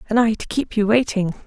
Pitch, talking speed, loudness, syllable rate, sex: 220 Hz, 245 wpm, -20 LUFS, 5.7 syllables/s, female